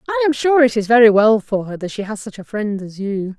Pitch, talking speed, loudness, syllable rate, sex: 225 Hz, 300 wpm, -16 LUFS, 5.7 syllables/s, female